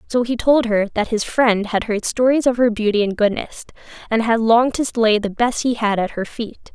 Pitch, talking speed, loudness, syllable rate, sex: 225 Hz, 240 wpm, -18 LUFS, 5.1 syllables/s, female